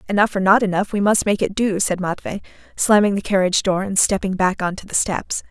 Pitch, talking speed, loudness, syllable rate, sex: 195 Hz, 230 wpm, -19 LUFS, 5.9 syllables/s, female